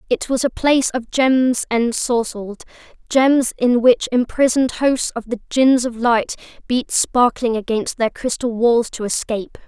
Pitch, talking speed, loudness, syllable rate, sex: 245 Hz, 155 wpm, -18 LUFS, 4.4 syllables/s, female